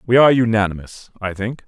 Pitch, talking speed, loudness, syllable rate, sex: 110 Hz, 180 wpm, -17 LUFS, 6.3 syllables/s, male